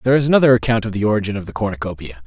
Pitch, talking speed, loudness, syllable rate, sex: 115 Hz, 265 wpm, -17 LUFS, 8.8 syllables/s, male